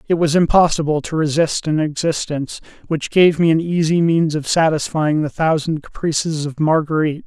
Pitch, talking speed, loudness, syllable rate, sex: 160 Hz, 165 wpm, -17 LUFS, 5.3 syllables/s, male